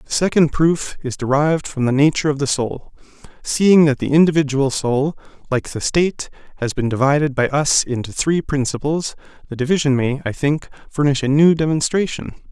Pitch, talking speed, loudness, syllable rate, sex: 145 Hz, 175 wpm, -18 LUFS, 5.3 syllables/s, male